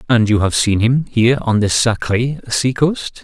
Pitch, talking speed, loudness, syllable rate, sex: 120 Hz, 205 wpm, -15 LUFS, 4.8 syllables/s, male